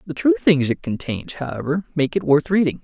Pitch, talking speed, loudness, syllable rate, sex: 155 Hz, 210 wpm, -20 LUFS, 5.4 syllables/s, male